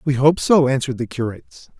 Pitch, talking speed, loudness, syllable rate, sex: 135 Hz, 200 wpm, -18 LUFS, 6.1 syllables/s, male